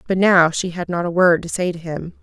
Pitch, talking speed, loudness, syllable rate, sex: 175 Hz, 295 wpm, -18 LUFS, 5.5 syllables/s, female